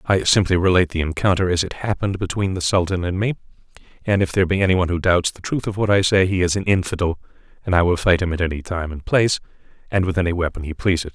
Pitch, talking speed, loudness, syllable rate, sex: 90 Hz, 255 wpm, -20 LUFS, 7.0 syllables/s, male